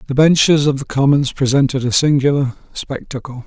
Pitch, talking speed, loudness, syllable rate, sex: 140 Hz, 155 wpm, -15 LUFS, 5.5 syllables/s, male